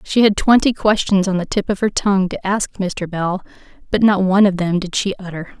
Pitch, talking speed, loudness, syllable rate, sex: 195 Hz, 235 wpm, -17 LUFS, 5.4 syllables/s, female